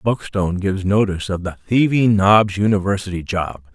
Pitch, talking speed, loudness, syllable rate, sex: 100 Hz, 145 wpm, -18 LUFS, 5.4 syllables/s, male